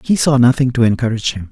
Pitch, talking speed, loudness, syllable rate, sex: 120 Hz, 235 wpm, -14 LUFS, 7.1 syllables/s, male